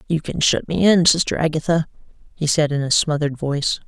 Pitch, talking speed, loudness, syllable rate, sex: 155 Hz, 200 wpm, -19 LUFS, 6.0 syllables/s, female